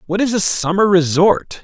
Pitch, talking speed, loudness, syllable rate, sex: 190 Hz, 185 wpm, -15 LUFS, 4.8 syllables/s, male